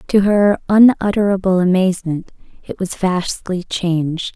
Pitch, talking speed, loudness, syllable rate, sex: 190 Hz, 110 wpm, -16 LUFS, 4.5 syllables/s, female